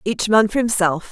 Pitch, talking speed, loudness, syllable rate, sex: 205 Hz, 215 wpm, -17 LUFS, 5.0 syllables/s, female